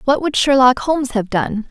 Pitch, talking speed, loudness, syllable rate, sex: 255 Hz, 210 wpm, -15 LUFS, 5.0 syllables/s, female